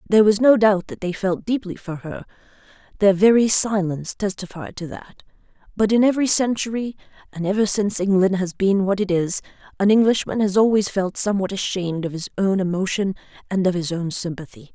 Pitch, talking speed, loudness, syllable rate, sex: 195 Hz, 180 wpm, -20 LUFS, 5.8 syllables/s, female